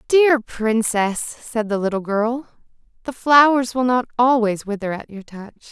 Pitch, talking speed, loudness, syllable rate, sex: 235 Hz, 160 wpm, -19 LUFS, 4.3 syllables/s, female